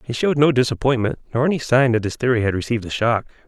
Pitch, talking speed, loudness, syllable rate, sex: 125 Hz, 240 wpm, -19 LUFS, 7.2 syllables/s, male